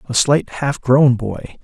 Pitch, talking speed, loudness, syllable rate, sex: 130 Hz, 185 wpm, -16 LUFS, 3.6 syllables/s, male